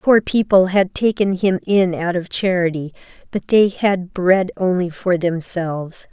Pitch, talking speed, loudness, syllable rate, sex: 185 Hz, 155 wpm, -18 LUFS, 4.1 syllables/s, female